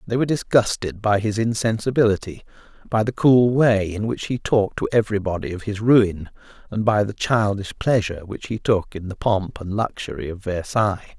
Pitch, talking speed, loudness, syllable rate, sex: 105 Hz, 190 wpm, -21 LUFS, 5.4 syllables/s, male